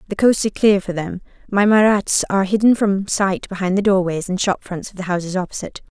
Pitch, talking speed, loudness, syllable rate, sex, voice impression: 195 Hz, 210 wpm, -18 LUFS, 5.8 syllables/s, female, very feminine, slightly young, thin, slightly tensed, slightly powerful, bright, soft, slightly clear, fluent, slightly raspy, very cute, very intellectual, refreshing, sincere, very calm, very friendly, very reassuring, very unique, very elegant, slightly wild, sweet, lively, kind, slightly intense, slightly modest, light